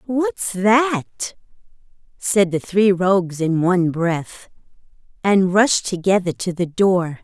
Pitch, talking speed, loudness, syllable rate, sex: 185 Hz, 125 wpm, -18 LUFS, 3.4 syllables/s, female